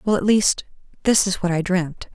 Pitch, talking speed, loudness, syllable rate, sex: 185 Hz, 225 wpm, -20 LUFS, 4.9 syllables/s, female